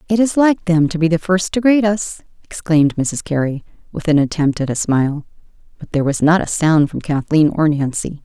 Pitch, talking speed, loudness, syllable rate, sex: 165 Hz, 220 wpm, -16 LUFS, 5.4 syllables/s, female